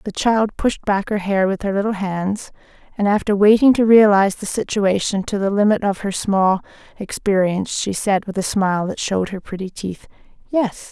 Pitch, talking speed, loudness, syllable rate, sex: 200 Hz, 190 wpm, -18 LUFS, 5.1 syllables/s, female